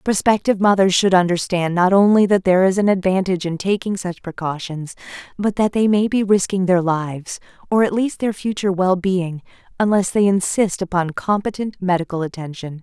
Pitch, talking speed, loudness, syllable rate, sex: 190 Hz, 170 wpm, -18 LUFS, 5.5 syllables/s, female